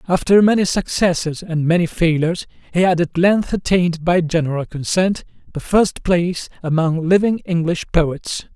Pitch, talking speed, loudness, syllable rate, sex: 175 Hz, 145 wpm, -18 LUFS, 4.9 syllables/s, male